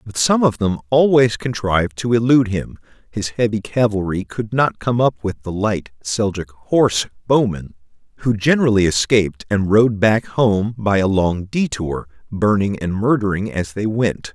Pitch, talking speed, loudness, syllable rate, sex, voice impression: 110 Hz, 165 wpm, -18 LUFS, 4.6 syllables/s, male, masculine, adult-like, slightly thick, slightly cool, intellectual, friendly, slightly elegant